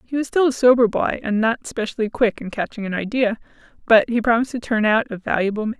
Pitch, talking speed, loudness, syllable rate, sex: 230 Hz, 240 wpm, -20 LUFS, 6.2 syllables/s, female